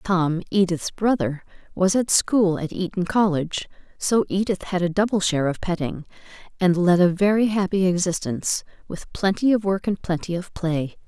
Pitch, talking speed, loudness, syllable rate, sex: 185 Hz, 170 wpm, -22 LUFS, 5.0 syllables/s, female